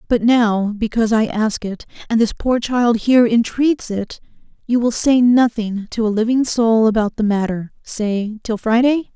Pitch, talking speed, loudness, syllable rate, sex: 225 Hz, 175 wpm, -17 LUFS, 4.5 syllables/s, female